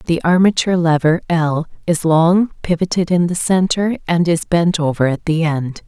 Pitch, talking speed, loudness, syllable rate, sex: 170 Hz, 175 wpm, -16 LUFS, 4.8 syllables/s, female